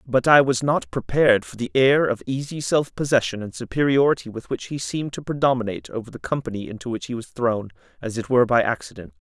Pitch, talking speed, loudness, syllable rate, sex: 125 Hz, 215 wpm, -22 LUFS, 6.3 syllables/s, male